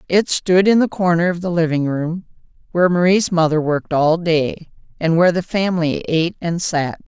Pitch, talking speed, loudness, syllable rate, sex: 170 Hz, 185 wpm, -17 LUFS, 5.3 syllables/s, female